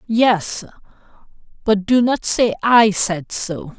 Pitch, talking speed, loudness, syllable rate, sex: 210 Hz, 125 wpm, -17 LUFS, 3.1 syllables/s, female